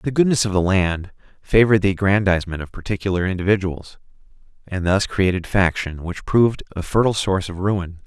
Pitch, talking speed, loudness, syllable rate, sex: 95 Hz, 165 wpm, -20 LUFS, 5.9 syllables/s, male